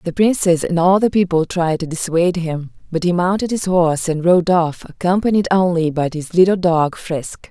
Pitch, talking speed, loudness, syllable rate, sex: 175 Hz, 200 wpm, -17 LUFS, 5.0 syllables/s, female